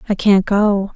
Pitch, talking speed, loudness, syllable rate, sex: 200 Hz, 190 wpm, -15 LUFS, 4.0 syllables/s, female